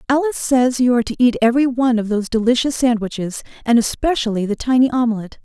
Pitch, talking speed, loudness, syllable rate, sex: 240 Hz, 190 wpm, -17 LUFS, 7.1 syllables/s, female